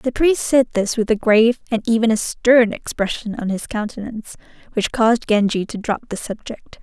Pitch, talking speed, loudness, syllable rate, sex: 225 Hz, 195 wpm, -19 LUFS, 5.2 syllables/s, female